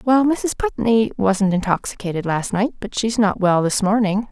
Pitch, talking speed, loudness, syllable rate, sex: 210 Hz, 180 wpm, -19 LUFS, 4.7 syllables/s, female